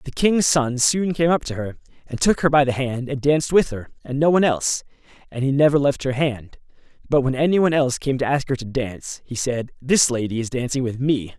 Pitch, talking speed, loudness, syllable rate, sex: 135 Hz, 245 wpm, -20 LUFS, 5.7 syllables/s, male